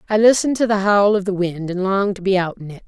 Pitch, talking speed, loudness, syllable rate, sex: 195 Hz, 315 wpm, -18 LUFS, 6.9 syllables/s, female